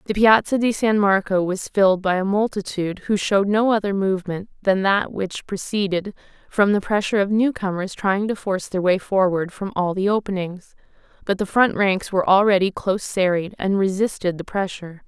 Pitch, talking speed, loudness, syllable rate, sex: 195 Hz, 185 wpm, -20 LUFS, 5.4 syllables/s, female